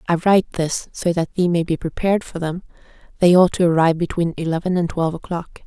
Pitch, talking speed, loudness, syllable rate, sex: 170 Hz, 210 wpm, -19 LUFS, 6.2 syllables/s, female